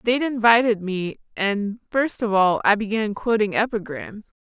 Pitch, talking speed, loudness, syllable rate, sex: 215 Hz, 150 wpm, -21 LUFS, 4.4 syllables/s, female